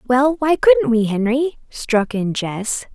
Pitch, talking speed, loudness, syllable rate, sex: 245 Hz, 165 wpm, -18 LUFS, 3.9 syllables/s, female